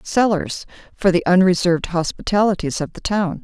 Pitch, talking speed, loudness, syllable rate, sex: 185 Hz, 140 wpm, -18 LUFS, 5.2 syllables/s, female